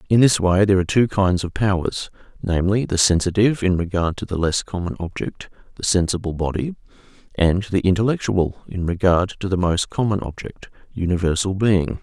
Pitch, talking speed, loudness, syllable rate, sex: 95 Hz, 155 wpm, -20 LUFS, 5.6 syllables/s, male